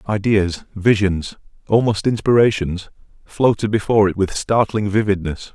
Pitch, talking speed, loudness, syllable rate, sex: 100 Hz, 110 wpm, -18 LUFS, 4.7 syllables/s, male